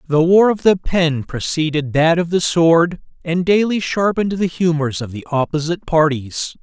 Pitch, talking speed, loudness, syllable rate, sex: 165 Hz, 170 wpm, -17 LUFS, 4.7 syllables/s, male